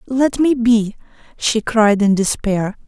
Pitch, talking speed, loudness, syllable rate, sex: 225 Hz, 145 wpm, -16 LUFS, 3.6 syllables/s, female